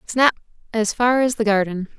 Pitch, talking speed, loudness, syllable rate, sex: 225 Hz, 180 wpm, -19 LUFS, 4.8 syllables/s, female